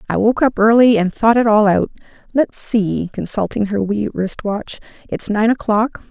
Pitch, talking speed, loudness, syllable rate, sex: 215 Hz, 185 wpm, -16 LUFS, 4.6 syllables/s, female